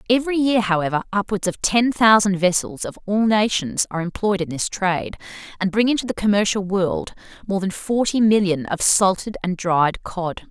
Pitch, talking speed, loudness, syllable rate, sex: 200 Hz, 175 wpm, -20 LUFS, 5.2 syllables/s, female